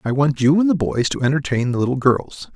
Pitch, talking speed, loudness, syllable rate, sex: 135 Hz, 260 wpm, -18 LUFS, 5.7 syllables/s, male